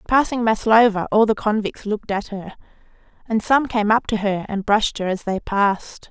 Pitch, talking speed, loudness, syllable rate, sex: 215 Hz, 195 wpm, -19 LUFS, 5.2 syllables/s, female